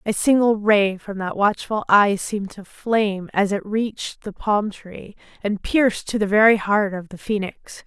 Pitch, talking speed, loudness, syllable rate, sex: 205 Hz, 190 wpm, -20 LUFS, 4.5 syllables/s, female